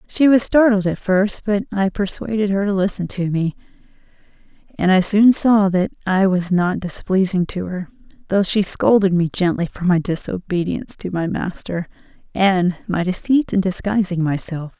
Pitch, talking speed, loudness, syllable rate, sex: 190 Hz, 165 wpm, -18 LUFS, 4.8 syllables/s, female